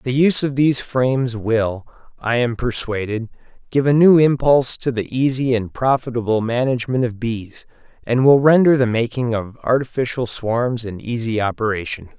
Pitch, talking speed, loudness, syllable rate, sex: 125 Hz, 160 wpm, -18 LUFS, 5.0 syllables/s, male